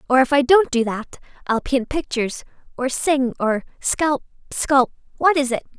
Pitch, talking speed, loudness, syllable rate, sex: 265 Hz, 155 wpm, -20 LUFS, 4.6 syllables/s, female